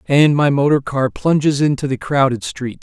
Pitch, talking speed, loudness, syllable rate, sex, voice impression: 140 Hz, 190 wpm, -16 LUFS, 4.7 syllables/s, male, masculine, middle-aged, slightly powerful, clear, cool, intellectual, slightly friendly, slightly wild